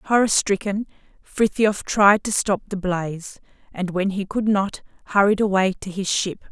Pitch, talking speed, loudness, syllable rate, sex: 195 Hz, 165 wpm, -21 LUFS, 4.6 syllables/s, female